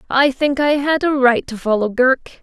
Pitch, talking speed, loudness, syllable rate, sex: 265 Hz, 225 wpm, -16 LUFS, 5.0 syllables/s, female